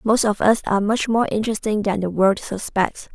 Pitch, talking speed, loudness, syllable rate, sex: 210 Hz, 210 wpm, -20 LUFS, 5.4 syllables/s, female